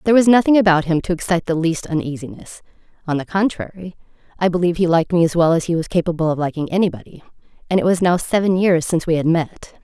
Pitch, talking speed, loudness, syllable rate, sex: 175 Hz, 225 wpm, -18 LUFS, 7.0 syllables/s, female